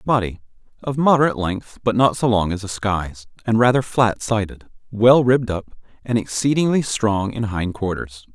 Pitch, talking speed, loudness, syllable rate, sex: 110 Hz, 165 wpm, -19 LUFS, 5.0 syllables/s, male